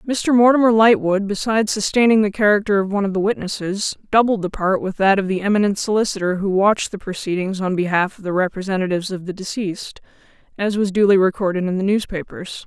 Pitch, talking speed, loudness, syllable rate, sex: 200 Hz, 190 wpm, -18 LUFS, 6.3 syllables/s, female